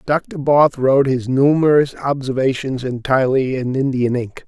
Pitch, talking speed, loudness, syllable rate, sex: 135 Hz, 135 wpm, -17 LUFS, 4.7 syllables/s, male